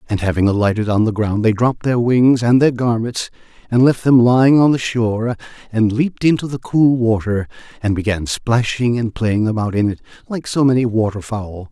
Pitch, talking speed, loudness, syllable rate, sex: 115 Hz, 195 wpm, -16 LUFS, 5.3 syllables/s, male